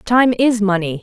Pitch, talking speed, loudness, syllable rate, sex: 210 Hz, 175 wpm, -15 LUFS, 4.6 syllables/s, female